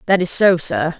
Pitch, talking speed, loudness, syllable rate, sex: 175 Hz, 240 wpm, -16 LUFS, 4.8 syllables/s, female